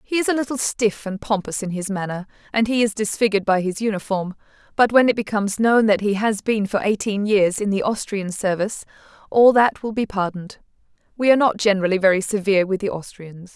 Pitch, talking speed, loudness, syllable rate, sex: 205 Hz, 210 wpm, -20 LUFS, 6.0 syllables/s, female